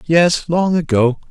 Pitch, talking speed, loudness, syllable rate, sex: 160 Hz, 140 wpm, -15 LUFS, 3.6 syllables/s, male